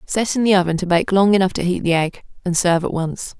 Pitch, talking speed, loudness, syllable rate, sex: 185 Hz, 280 wpm, -18 LUFS, 6.2 syllables/s, female